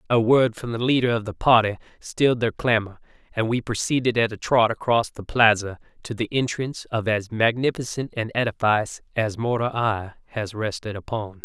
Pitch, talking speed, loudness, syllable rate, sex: 115 Hz, 180 wpm, -23 LUFS, 5.3 syllables/s, male